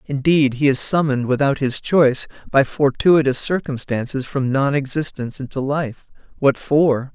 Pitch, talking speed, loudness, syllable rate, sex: 140 Hz, 145 wpm, -18 LUFS, 4.8 syllables/s, male